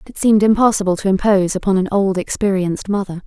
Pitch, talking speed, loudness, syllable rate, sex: 195 Hz, 200 wpm, -16 LUFS, 7.1 syllables/s, female